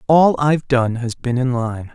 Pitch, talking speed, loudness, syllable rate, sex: 130 Hz, 215 wpm, -18 LUFS, 4.5 syllables/s, male